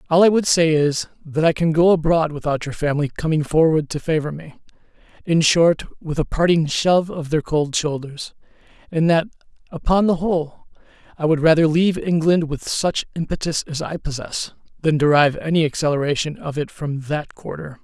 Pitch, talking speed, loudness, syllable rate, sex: 155 Hz, 175 wpm, -19 LUFS, 5.3 syllables/s, male